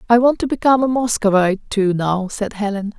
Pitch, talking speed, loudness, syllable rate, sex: 215 Hz, 200 wpm, -17 LUFS, 6.3 syllables/s, female